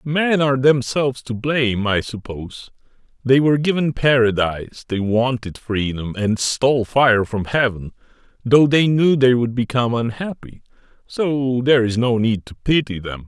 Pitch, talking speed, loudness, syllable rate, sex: 125 Hz, 155 wpm, -18 LUFS, 4.7 syllables/s, male